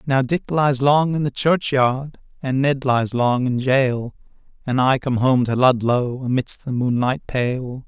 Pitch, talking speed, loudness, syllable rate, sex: 130 Hz, 175 wpm, -19 LUFS, 3.9 syllables/s, male